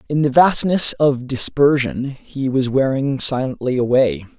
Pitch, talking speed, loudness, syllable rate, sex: 130 Hz, 135 wpm, -17 LUFS, 4.2 syllables/s, male